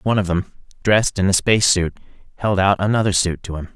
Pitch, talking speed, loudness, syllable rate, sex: 95 Hz, 210 wpm, -18 LUFS, 6.7 syllables/s, male